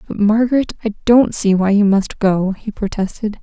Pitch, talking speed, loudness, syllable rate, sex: 210 Hz, 195 wpm, -16 LUFS, 5.0 syllables/s, female